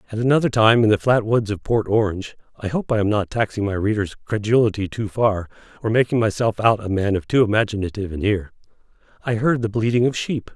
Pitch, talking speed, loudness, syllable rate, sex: 110 Hz, 215 wpm, -20 LUFS, 4.7 syllables/s, male